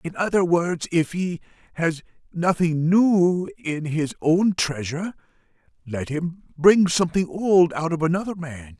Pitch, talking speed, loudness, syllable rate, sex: 170 Hz, 145 wpm, -22 LUFS, 4.2 syllables/s, male